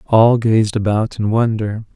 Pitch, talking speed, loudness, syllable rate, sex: 110 Hz, 155 wpm, -16 LUFS, 4.1 syllables/s, male